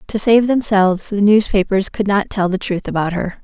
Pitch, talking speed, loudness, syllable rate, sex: 200 Hz, 210 wpm, -16 LUFS, 5.2 syllables/s, female